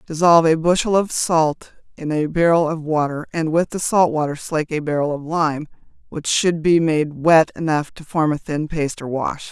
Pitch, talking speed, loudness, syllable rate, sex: 160 Hz, 210 wpm, -19 LUFS, 5.0 syllables/s, female